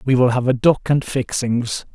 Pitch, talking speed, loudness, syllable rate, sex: 125 Hz, 215 wpm, -18 LUFS, 4.5 syllables/s, male